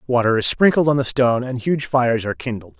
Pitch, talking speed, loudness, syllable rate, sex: 125 Hz, 235 wpm, -18 LUFS, 6.4 syllables/s, male